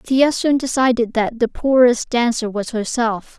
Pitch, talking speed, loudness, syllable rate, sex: 240 Hz, 160 wpm, -17 LUFS, 4.3 syllables/s, female